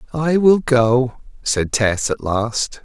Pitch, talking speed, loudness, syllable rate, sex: 130 Hz, 150 wpm, -17 LUFS, 3.0 syllables/s, male